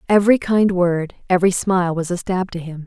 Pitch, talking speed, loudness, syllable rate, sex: 185 Hz, 210 wpm, -18 LUFS, 5.9 syllables/s, female